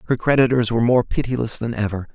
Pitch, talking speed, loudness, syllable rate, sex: 120 Hz, 195 wpm, -19 LUFS, 6.8 syllables/s, male